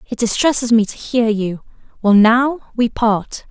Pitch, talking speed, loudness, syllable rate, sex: 230 Hz, 170 wpm, -16 LUFS, 4.2 syllables/s, female